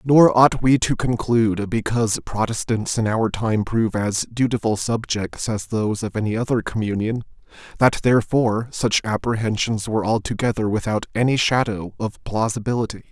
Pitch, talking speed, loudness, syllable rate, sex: 110 Hz, 140 wpm, -21 LUFS, 5.2 syllables/s, male